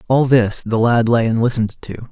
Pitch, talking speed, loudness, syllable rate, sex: 115 Hz, 225 wpm, -16 LUFS, 5.4 syllables/s, male